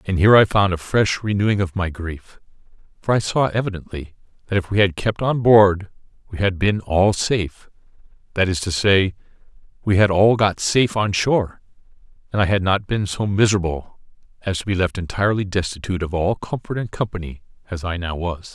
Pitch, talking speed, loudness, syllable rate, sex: 95 Hz, 190 wpm, -20 LUFS, 5.6 syllables/s, male